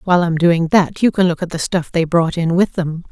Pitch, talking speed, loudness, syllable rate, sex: 170 Hz, 290 wpm, -16 LUFS, 5.4 syllables/s, female